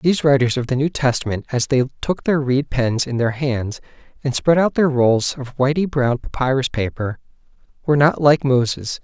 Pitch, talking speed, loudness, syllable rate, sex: 135 Hz, 195 wpm, -19 LUFS, 5.1 syllables/s, male